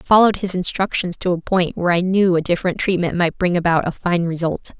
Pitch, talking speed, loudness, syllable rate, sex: 180 Hz, 240 wpm, -18 LUFS, 6.1 syllables/s, female